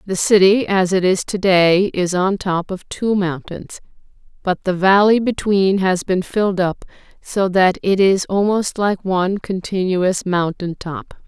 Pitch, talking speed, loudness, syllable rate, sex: 190 Hz, 160 wpm, -17 LUFS, 4.1 syllables/s, female